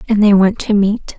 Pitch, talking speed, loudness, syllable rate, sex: 205 Hz, 255 wpm, -13 LUFS, 5.0 syllables/s, female